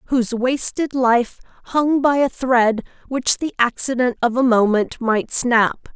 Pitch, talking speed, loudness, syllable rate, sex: 245 Hz, 150 wpm, -18 LUFS, 4.0 syllables/s, female